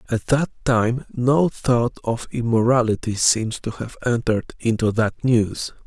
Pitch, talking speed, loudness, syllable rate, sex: 115 Hz, 145 wpm, -21 LUFS, 4.2 syllables/s, male